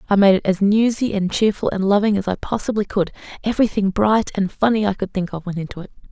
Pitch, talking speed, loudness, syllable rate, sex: 200 Hz, 235 wpm, -19 LUFS, 6.3 syllables/s, female